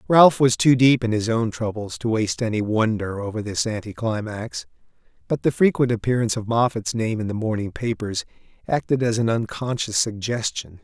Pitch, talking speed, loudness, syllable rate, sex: 110 Hz, 170 wpm, -22 LUFS, 5.3 syllables/s, male